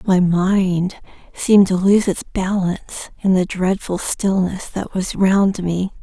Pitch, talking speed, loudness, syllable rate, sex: 190 Hz, 150 wpm, -18 LUFS, 3.9 syllables/s, female